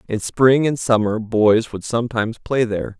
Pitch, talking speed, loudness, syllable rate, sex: 115 Hz, 180 wpm, -18 LUFS, 5.0 syllables/s, male